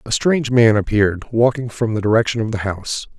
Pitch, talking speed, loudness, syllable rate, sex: 115 Hz, 205 wpm, -17 LUFS, 6.2 syllables/s, male